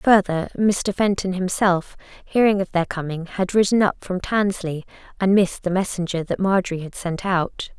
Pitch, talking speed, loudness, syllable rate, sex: 185 Hz, 170 wpm, -21 LUFS, 4.8 syllables/s, female